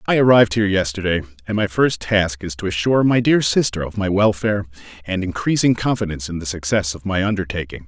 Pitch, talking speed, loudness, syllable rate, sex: 100 Hz, 200 wpm, -19 LUFS, 6.3 syllables/s, male